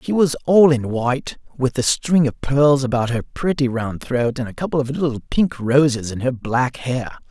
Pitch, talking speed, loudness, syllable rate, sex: 130 Hz, 215 wpm, -19 LUFS, 4.7 syllables/s, male